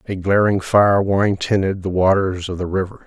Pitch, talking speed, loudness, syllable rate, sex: 95 Hz, 195 wpm, -18 LUFS, 4.8 syllables/s, male